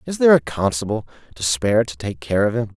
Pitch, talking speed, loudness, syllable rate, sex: 110 Hz, 235 wpm, -20 LUFS, 6.3 syllables/s, male